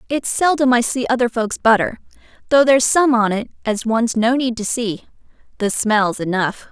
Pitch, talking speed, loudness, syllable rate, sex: 235 Hz, 180 wpm, -17 LUFS, 5.1 syllables/s, female